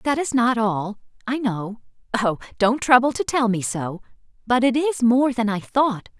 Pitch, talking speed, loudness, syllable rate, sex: 230 Hz, 175 wpm, -21 LUFS, 4.4 syllables/s, female